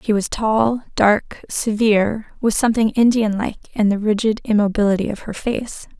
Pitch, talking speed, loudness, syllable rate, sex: 215 Hz, 160 wpm, -18 LUFS, 4.9 syllables/s, female